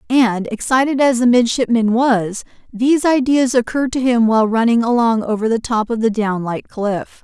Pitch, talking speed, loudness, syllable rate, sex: 235 Hz, 180 wpm, -16 LUFS, 5.0 syllables/s, female